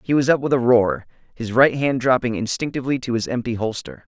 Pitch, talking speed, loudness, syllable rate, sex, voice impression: 125 Hz, 215 wpm, -20 LUFS, 5.9 syllables/s, male, masculine, adult-like, tensed, powerful, clear, fluent, cool, intellectual, calm, friendly, reassuring, wild, slightly kind